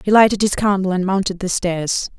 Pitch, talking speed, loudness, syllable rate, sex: 190 Hz, 220 wpm, -18 LUFS, 5.4 syllables/s, female